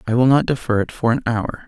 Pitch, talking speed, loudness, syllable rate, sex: 120 Hz, 285 wpm, -18 LUFS, 6.1 syllables/s, male